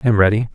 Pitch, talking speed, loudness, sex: 110 Hz, 330 wpm, -16 LUFS, male